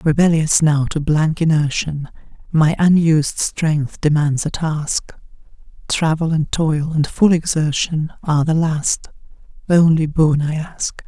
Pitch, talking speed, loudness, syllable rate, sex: 155 Hz, 130 wpm, -17 LUFS, 4.0 syllables/s, female